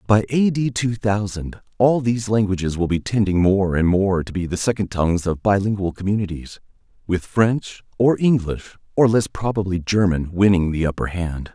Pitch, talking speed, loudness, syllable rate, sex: 100 Hz, 180 wpm, -20 LUFS, 5.1 syllables/s, male